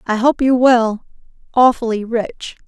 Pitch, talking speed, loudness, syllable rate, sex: 235 Hz, 135 wpm, -15 LUFS, 4.0 syllables/s, female